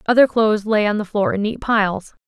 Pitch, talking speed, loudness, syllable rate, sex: 210 Hz, 235 wpm, -18 LUFS, 6.0 syllables/s, female